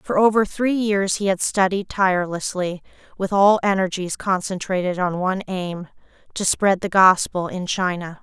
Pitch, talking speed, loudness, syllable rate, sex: 190 Hz, 145 wpm, -20 LUFS, 4.6 syllables/s, female